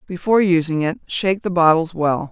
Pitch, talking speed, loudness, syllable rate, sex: 170 Hz, 180 wpm, -18 LUFS, 5.7 syllables/s, female